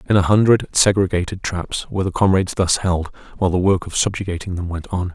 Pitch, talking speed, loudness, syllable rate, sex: 90 Hz, 210 wpm, -19 LUFS, 6.2 syllables/s, male